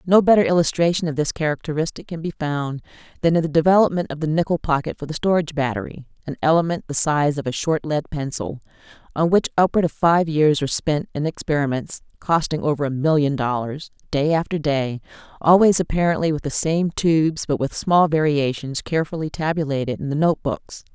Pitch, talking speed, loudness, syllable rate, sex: 155 Hz, 185 wpm, -20 LUFS, 5.8 syllables/s, female